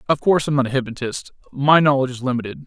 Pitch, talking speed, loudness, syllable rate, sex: 135 Hz, 225 wpm, -19 LUFS, 7.4 syllables/s, male